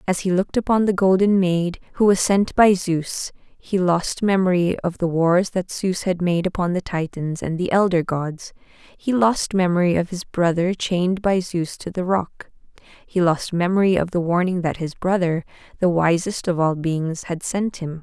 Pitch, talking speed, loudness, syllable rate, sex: 180 Hz, 195 wpm, -20 LUFS, 4.5 syllables/s, female